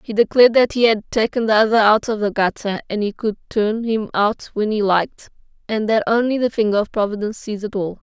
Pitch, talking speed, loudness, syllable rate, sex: 215 Hz, 230 wpm, -18 LUFS, 5.8 syllables/s, female